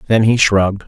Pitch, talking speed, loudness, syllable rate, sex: 105 Hz, 205 wpm, -13 LUFS, 5.9 syllables/s, male